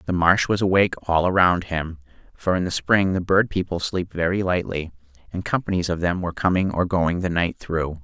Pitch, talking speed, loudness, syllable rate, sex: 90 Hz, 210 wpm, -22 LUFS, 5.2 syllables/s, male